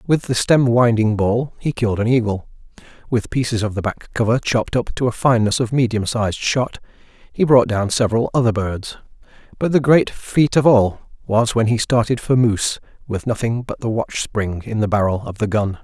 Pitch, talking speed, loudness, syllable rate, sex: 115 Hz, 205 wpm, -18 LUFS, 5.3 syllables/s, male